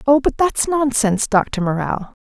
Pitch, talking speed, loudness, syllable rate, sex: 245 Hz, 160 wpm, -18 LUFS, 4.5 syllables/s, female